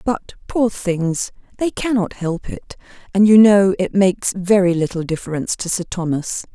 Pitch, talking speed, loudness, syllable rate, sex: 190 Hz, 165 wpm, -18 LUFS, 4.7 syllables/s, female